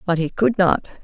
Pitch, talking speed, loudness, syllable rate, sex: 180 Hz, 230 wpm, -19 LUFS, 5.3 syllables/s, female